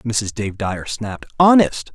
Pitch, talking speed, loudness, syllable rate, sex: 115 Hz, 155 wpm, -18 LUFS, 3.9 syllables/s, male